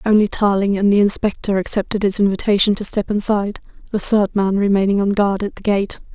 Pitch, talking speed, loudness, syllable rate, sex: 200 Hz, 195 wpm, -17 LUFS, 5.9 syllables/s, female